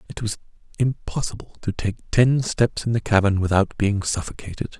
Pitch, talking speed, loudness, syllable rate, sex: 105 Hz, 165 wpm, -22 LUFS, 5.1 syllables/s, male